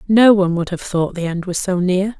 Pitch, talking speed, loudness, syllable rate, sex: 185 Hz, 275 wpm, -17 LUFS, 5.4 syllables/s, female